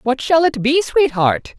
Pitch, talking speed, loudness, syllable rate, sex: 265 Hz, 190 wpm, -16 LUFS, 4.1 syllables/s, male